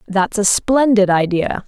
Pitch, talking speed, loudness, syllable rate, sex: 205 Hz, 145 wpm, -15 LUFS, 3.9 syllables/s, female